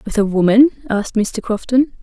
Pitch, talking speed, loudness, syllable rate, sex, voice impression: 225 Hz, 180 wpm, -16 LUFS, 5.4 syllables/s, female, feminine, slightly adult-like, slightly fluent, intellectual, slightly calm